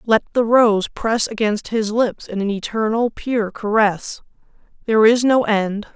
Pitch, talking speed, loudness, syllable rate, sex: 220 Hz, 160 wpm, -18 LUFS, 4.4 syllables/s, female